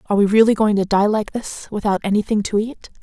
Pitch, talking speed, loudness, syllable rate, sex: 210 Hz, 240 wpm, -18 LUFS, 6.2 syllables/s, female